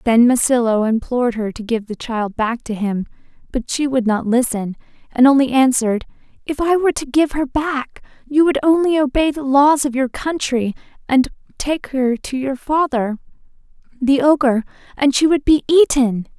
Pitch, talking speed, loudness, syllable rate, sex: 260 Hz, 175 wpm, -17 LUFS, 5.0 syllables/s, female